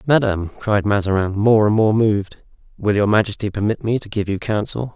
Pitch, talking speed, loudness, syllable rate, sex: 105 Hz, 195 wpm, -18 LUFS, 5.7 syllables/s, male